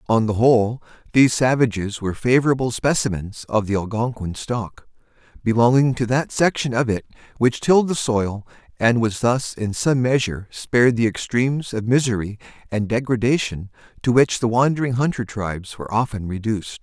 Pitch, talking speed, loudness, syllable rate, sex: 115 Hz, 155 wpm, -20 LUFS, 5.4 syllables/s, male